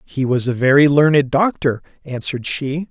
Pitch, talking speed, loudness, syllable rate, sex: 140 Hz, 165 wpm, -16 LUFS, 5.0 syllables/s, male